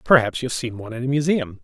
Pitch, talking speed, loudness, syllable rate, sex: 130 Hz, 295 wpm, -22 LUFS, 7.2 syllables/s, male